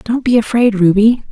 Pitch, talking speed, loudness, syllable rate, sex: 225 Hz, 180 wpm, -12 LUFS, 4.9 syllables/s, female